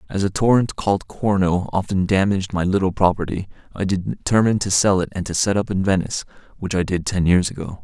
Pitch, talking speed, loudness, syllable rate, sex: 95 Hz, 205 wpm, -20 LUFS, 6.0 syllables/s, male